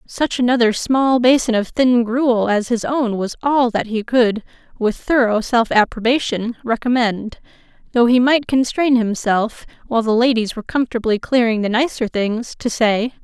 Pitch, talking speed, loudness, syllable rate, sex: 235 Hz, 165 wpm, -17 LUFS, 4.7 syllables/s, female